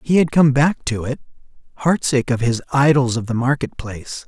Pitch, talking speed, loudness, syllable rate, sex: 135 Hz, 180 wpm, -18 LUFS, 5.2 syllables/s, male